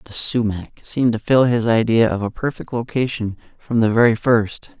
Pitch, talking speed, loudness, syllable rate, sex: 115 Hz, 190 wpm, -19 LUFS, 5.0 syllables/s, male